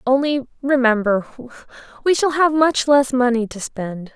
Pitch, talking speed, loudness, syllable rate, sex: 255 Hz, 145 wpm, -18 LUFS, 4.3 syllables/s, female